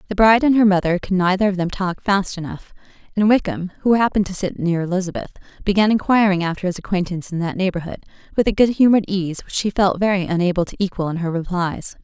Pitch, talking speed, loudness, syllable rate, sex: 190 Hz, 215 wpm, -19 LUFS, 6.5 syllables/s, female